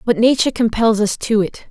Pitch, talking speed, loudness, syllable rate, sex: 225 Hz, 210 wpm, -16 LUFS, 5.8 syllables/s, female